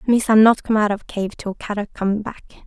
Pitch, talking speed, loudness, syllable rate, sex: 210 Hz, 225 wpm, -19 LUFS, 5.4 syllables/s, female